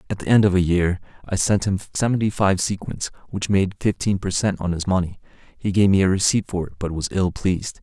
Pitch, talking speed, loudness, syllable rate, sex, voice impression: 95 Hz, 240 wpm, -21 LUFS, 5.7 syllables/s, male, masculine, adult-like, slightly relaxed, slightly dark, slightly hard, slightly muffled, raspy, intellectual, calm, wild, slightly sharp, slightly modest